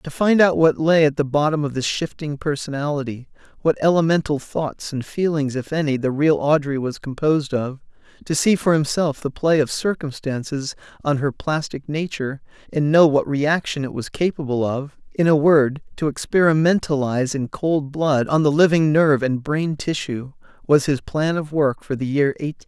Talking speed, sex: 185 wpm, male